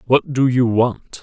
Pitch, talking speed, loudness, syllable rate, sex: 125 Hz, 195 wpm, -17 LUFS, 3.7 syllables/s, male